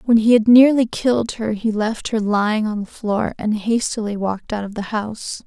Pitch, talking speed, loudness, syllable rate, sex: 220 Hz, 220 wpm, -19 LUFS, 5.1 syllables/s, female